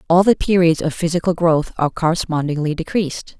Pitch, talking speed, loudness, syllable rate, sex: 165 Hz, 160 wpm, -18 LUFS, 6.0 syllables/s, female